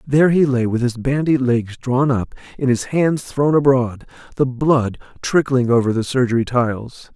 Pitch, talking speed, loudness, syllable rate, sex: 130 Hz, 175 wpm, -18 LUFS, 4.7 syllables/s, male